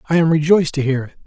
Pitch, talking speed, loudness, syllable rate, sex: 155 Hz, 285 wpm, -16 LUFS, 8.6 syllables/s, male